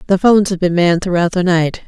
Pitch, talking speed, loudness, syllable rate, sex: 180 Hz, 255 wpm, -14 LUFS, 6.6 syllables/s, female